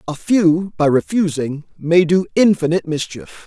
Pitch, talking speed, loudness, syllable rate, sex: 165 Hz, 140 wpm, -17 LUFS, 4.6 syllables/s, male